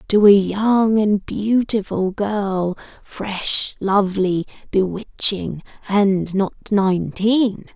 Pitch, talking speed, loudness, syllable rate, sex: 200 Hz, 95 wpm, -19 LUFS, 3.9 syllables/s, female